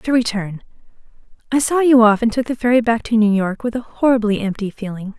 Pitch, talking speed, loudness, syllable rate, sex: 225 Hz, 220 wpm, -17 LUFS, 5.9 syllables/s, female